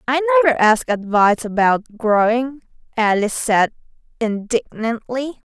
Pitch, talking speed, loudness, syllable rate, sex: 240 Hz, 95 wpm, -18 LUFS, 4.5 syllables/s, female